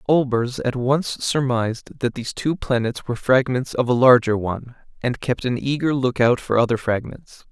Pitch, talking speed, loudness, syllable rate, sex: 125 Hz, 185 wpm, -21 LUFS, 4.9 syllables/s, male